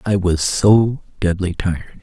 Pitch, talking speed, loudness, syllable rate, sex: 95 Hz, 150 wpm, -17 LUFS, 4.4 syllables/s, male